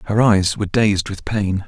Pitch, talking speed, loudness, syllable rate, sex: 100 Hz, 215 wpm, -18 LUFS, 4.8 syllables/s, male